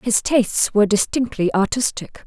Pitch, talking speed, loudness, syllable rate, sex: 220 Hz, 130 wpm, -18 LUFS, 5.2 syllables/s, female